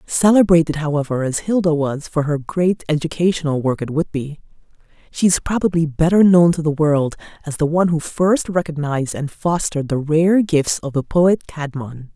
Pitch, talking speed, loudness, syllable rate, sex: 160 Hz, 175 wpm, -18 LUFS, 5.1 syllables/s, female